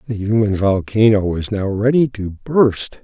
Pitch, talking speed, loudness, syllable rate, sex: 105 Hz, 160 wpm, -16 LUFS, 4.2 syllables/s, male